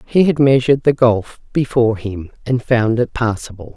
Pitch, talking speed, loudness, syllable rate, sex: 120 Hz, 175 wpm, -16 LUFS, 5.1 syllables/s, female